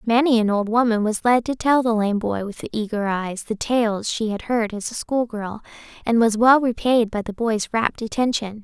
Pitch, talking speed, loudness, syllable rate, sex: 225 Hz, 220 wpm, -21 LUFS, 4.8 syllables/s, female